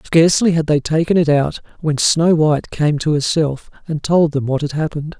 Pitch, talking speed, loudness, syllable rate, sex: 155 Hz, 210 wpm, -16 LUFS, 5.3 syllables/s, male